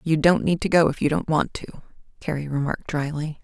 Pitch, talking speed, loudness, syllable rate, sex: 160 Hz, 225 wpm, -23 LUFS, 5.8 syllables/s, female